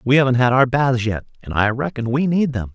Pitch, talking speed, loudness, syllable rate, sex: 125 Hz, 260 wpm, -18 LUFS, 5.7 syllables/s, male